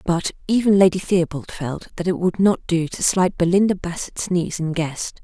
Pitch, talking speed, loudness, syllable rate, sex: 175 Hz, 195 wpm, -20 LUFS, 4.9 syllables/s, female